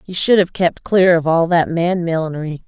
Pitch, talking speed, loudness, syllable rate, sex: 170 Hz, 225 wpm, -16 LUFS, 5.1 syllables/s, female